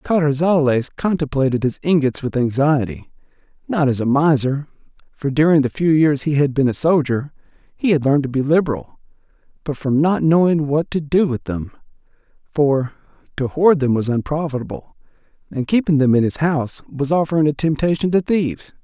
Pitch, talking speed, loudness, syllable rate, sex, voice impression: 145 Hz, 170 wpm, -18 LUFS, 5.4 syllables/s, male, masculine, adult-like, slightly thick, powerful, hard, muffled, cool, intellectual, friendly, reassuring, wild, lively, slightly strict